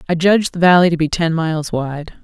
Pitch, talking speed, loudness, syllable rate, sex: 165 Hz, 240 wpm, -15 LUFS, 6.0 syllables/s, female